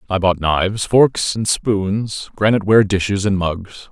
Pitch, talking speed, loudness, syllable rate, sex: 100 Hz, 170 wpm, -17 LUFS, 4.2 syllables/s, male